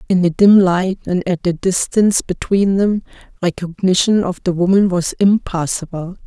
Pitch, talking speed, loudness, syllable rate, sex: 185 Hz, 155 wpm, -16 LUFS, 4.7 syllables/s, female